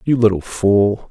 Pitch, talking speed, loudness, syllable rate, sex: 105 Hz, 165 wpm, -16 LUFS, 4.0 syllables/s, male